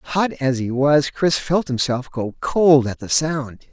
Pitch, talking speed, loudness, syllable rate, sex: 140 Hz, 195 wpm, -19 LUFS, 3.9 syllables/s, male